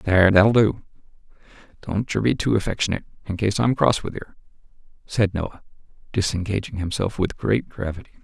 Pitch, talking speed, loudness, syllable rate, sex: 100 Hz, 155 wpm, -22 LUFS, 5.6 syllables/s, male